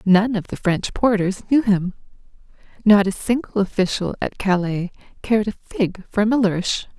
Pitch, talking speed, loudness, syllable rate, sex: 200 Hz, 155 wpm, -20 LUFS, 4.6 syllables/s, female